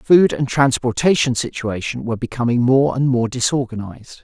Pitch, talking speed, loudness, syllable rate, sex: 125 Hz, 155 wpm, -18 LUFS, 5.6 syllables/s, male